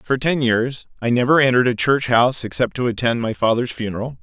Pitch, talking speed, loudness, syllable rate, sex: 120 Hz, 215 wpm, -18 LUFS, 5.9 syllables/s, male